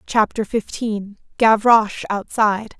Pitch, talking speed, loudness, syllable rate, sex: 215 Hz, 65 wpm, -18 LUFS, 4.1 syllables/s, female